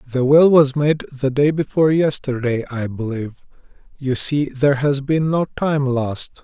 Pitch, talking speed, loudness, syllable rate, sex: 140 Hz, 170 wpm, -18 LUFS, 4.9 syllables/s, male